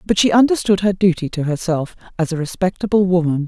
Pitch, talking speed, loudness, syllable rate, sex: 185 Hz, 190 wpm, -17 LUFS, 6.0 syllables/s, female